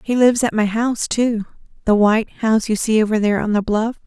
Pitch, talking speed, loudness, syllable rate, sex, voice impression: 220 Hz, 220 wpm, -18 LUFS, 6.3 syllables/s, female, very feminine, adult-like, slightly middle-aged, thin, slightly relaxed, slightly weak, slightly bright, soft, clear, fluent, slightly cute, intellectual, slightly refreshing, slightly sincere, calm, friendly, reassuring, unique, very elegant, sweet, slightly lively, kind